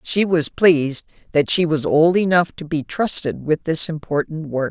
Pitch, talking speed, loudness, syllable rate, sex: 160 Hz, 190 wpm, -19 LUFS, 4.6 syllables/s, female